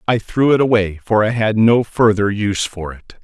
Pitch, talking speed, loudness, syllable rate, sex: 110 Hz, 220 wpm, -16 LUFS, 4.9 syllables/s, male